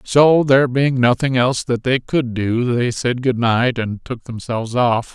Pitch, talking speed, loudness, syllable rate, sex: 125 Hz, 200 wpm, -17 LUFS, 4.3 syllables/s, male